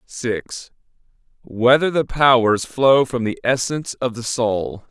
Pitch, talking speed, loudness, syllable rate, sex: 125 Hz, 135 wpm, -18 LUFS, 4.3 syllables/s, male